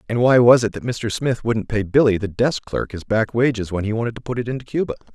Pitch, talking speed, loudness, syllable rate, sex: 115 Hz, 280 wpm, -20 LUFS, 6.1 syllables/s, male